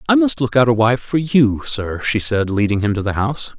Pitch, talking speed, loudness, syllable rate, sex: 115 Hz, 270 wpm, -17 LUFS, 5.4 syllables/s, male